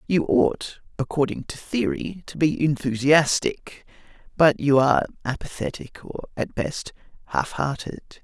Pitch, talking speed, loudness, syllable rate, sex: 150 Hz, 125 wpm, -23 LUFS, 4.3 syllables/s, male